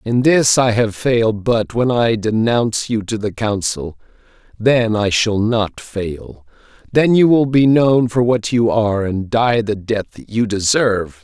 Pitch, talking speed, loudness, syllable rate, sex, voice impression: 110 Hz, 180 wpm, -16 LUFS, 4.1 syllables/s, male, very masculine, old, thick, relaxed, slightly powerful, bright, soft, slightly clear, fluent, slightly raspy, cool, intellectual, sincere, very calm, very mature, friendly, reassuring, slightly unique, slightly elegant, slightly wild, sweet, lively, kind, slightly modest